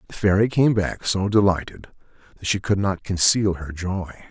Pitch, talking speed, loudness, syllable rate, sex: 95 Hz, 180 wpm, -21 LUFS, 4.6 syllables/s, male